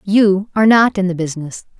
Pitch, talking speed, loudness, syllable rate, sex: 195 Hz, 200 wpm, -14 LUFS, 5.8 syllables/s, female